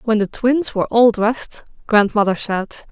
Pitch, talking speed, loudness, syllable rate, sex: 220 Hz, 165 wpm, -17 LUFS, 4.5 syllables/s, female